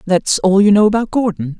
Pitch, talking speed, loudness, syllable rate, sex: 200 Hz, 225 wpm, -13 LUFS, 5.5 syllables/s, female